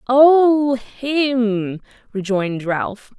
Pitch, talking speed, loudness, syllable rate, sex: 240 Hz, 75 wpm, -17 LUFS, 2.3 syllables/s, female